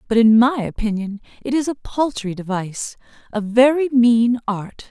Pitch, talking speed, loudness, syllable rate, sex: 230 Hz, 160 wpm, -18 LUFS, 4.7 syllables/s, female